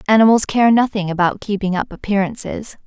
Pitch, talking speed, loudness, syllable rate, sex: 205 Hz, 145 wpm, -17 LUFS, 5.7 syllables/s, female